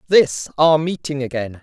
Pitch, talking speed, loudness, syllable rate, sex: 135 Hz, 110 wpm, -18 LUFS, 4.4 syllables/s, male